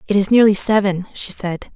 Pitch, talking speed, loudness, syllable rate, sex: 200 Hz, 205 wpm, -16 LUFS, 5.4 syllables/s, female